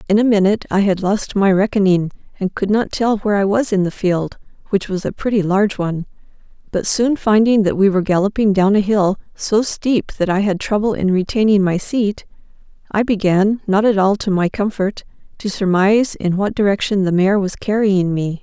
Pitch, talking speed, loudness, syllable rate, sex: 200 Hz, 200 wpm, -17 LUFS, 5.3 syllables/s, female